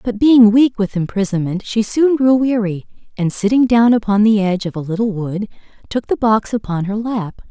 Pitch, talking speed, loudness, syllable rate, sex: 215 Hz, 200 wpm, -16 LUFS, 5.2 syllables/s, female